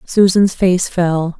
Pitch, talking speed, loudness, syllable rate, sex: 180 Hz, 130 wpm, -14 LUFS, 3.2 syllables/s, female